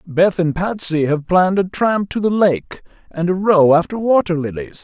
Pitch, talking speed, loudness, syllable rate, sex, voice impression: 180 Hz, 200 wpm, -16 LUFS, 4.8 syllables/s, male, very masculine, very adult-like, middle-aged, very thick, tensed, very powerful, slightly dark, soft, slightly clear, fluent, very cool, intellectual, sincere, very calm, very mature, friendly, very reassuring, unique, slightly elegant, very wild, sweet, slightly lively, very kind, slightly modest